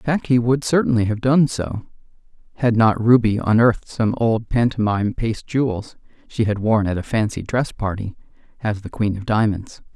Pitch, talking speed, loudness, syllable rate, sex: 110 Hz, 180 wpm, -19 LUFS, 5.2 syllables/s, male